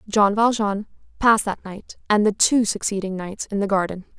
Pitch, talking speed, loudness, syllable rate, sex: 205 Hz, 185 wpm, -21 LUFS, 5.2 syllables/s, female